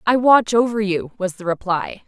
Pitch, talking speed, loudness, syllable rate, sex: 210 Hz, 205 wpm, -18 LUFS, 4.8 syllables/s, female